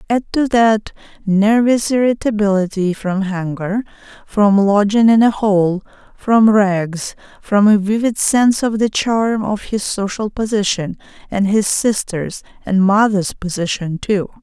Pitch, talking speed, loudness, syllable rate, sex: 205 Hz, 135 wpm, -16 LUFS, 4.0 syllables/s, female